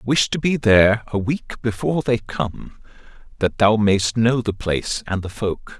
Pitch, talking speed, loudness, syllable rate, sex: 110 Hz, 185 wpm, -20 LUFS, 4.3 syllables/s, male